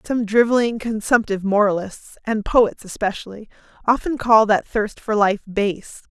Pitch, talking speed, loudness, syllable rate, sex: 215 Hz, 115 wpm, -19 LUFS, 4.6 syllables/s, female